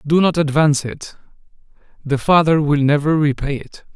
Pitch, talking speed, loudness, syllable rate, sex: 150 Hz, 150 wpm, -16 LUFS, 5.1 syllables/s, male